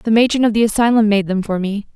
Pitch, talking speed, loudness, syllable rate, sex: 215 Hz, 275 wpm, -15 LUFS, 6.5 syllables/s, female